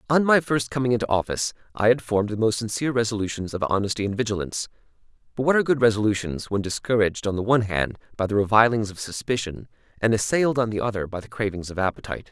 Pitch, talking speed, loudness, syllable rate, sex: 110 Hz, 210 wpm, -23 LUFS, 7.2 syllables/s, male